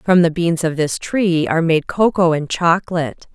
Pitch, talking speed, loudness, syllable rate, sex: 170 Hz, 195 wpm, -17 LUFS, 4.9 syllables/s, female